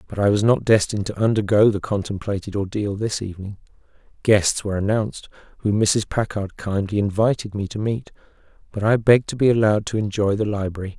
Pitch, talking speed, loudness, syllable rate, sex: 105 Hz, 180 wpm, -21 LUFS, 6.1 syllables/s, male